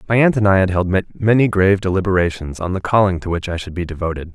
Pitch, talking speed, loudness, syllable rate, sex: 95 Hz, 250 wpm, -17 LUFS, 6.7 syllables/s, male